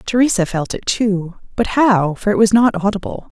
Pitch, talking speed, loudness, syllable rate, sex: 205 Hz, 175 wpm, -16 LUFS, 4.9 syllables/s, female